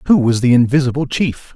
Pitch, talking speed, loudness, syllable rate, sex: 130 Hz, 195 wpm, -15 LUFS, 5.8 syllables/s, male